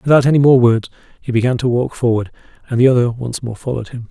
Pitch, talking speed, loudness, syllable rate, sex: 120 Hz, 235 wpm, -15 LUFS, 6.9 syllables/s, male